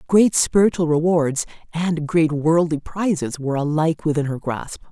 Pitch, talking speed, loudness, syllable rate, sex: 160 Hz, 145 wpm, -20 LUFS, 4.8 syllables/s, female